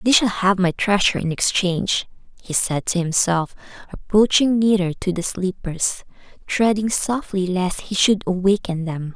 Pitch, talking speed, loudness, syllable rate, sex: 190 Hz, 150 wpm, -20 LUFS, 4.6 syllables/s, female